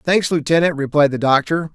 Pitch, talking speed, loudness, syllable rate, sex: 155 Hz, 170 wpm, -17 LUFS, 5.6 syllables/s, male